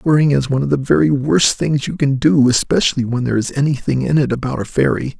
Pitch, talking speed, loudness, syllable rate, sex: 130 Hz, 245 wpm, -16 LUFS, 6.2 syllables/s, male